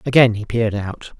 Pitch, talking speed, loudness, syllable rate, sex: 115 Hz, 200 wpm, -18 LUFS, 5.8 syllables/s, male